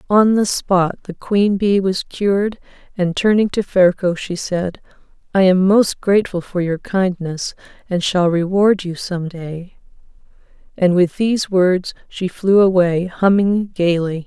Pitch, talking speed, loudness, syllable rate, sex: 185 Hz, 150 wpm, -17 LUFS, 4.0 syllables/s, female